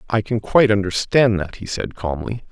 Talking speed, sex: 190 wpm, male